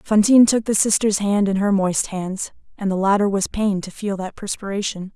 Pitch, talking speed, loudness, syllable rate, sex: 200 Hz, 210 wpm, -19 LUFS, 5.4 syllables/s, female